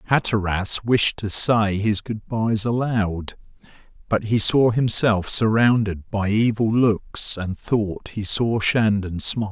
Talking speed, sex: 145 wpm, male